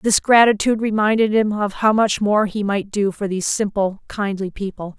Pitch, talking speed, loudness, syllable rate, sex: 205 Hz, 195 wpm, -18 LUFS, 5.2 syllables/s, female